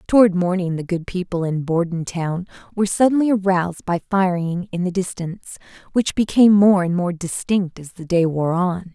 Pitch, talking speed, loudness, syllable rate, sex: 180 Hz, 175 wpm, -19 LUFS, 5.3 syllables/s, female